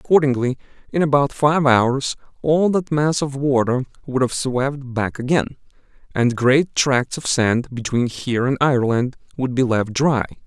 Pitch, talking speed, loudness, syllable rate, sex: 135 Hz, 160 wpm, -19 LUFS, 4.6 syllables/s, male